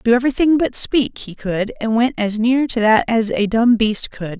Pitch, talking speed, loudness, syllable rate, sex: 230 Hz, 230 wpm, -17 LUFS, 4.7 syllables/s, female